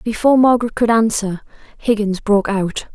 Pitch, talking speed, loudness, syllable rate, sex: 215 Hz, 145 wpm, -16 LUFS, 5.5 syllables/s, female